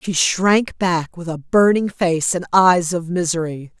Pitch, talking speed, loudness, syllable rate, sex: 175 Hz, 175 wpm, -17 LUFS, 3.8 syllables/s, female